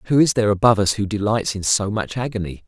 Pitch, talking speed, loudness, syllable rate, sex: 105 Hz, 245 wpm, -19 LUFS, 6.9 syllables/s, male